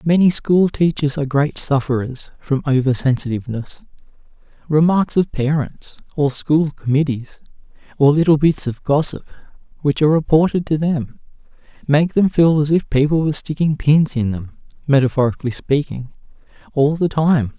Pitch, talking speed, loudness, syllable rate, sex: 145 Hz, 135 wpm, -17 LUFS, 5.1 syllables/s, male